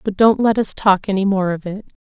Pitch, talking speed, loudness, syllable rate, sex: 200 Hz, 265 wpm, -17 LUFS, 5.6 syllables/s, female